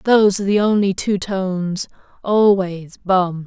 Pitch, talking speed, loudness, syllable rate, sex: 190 Hz, 140 wpm, -18 LUFS, 4.4 syllables/s, female